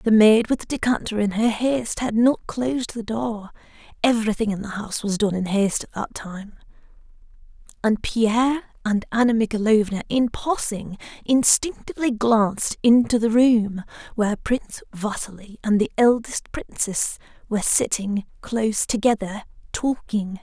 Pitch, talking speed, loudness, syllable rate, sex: 220 Hz, 140 wpm, -22 LUFS, 4.1 syllables/s, female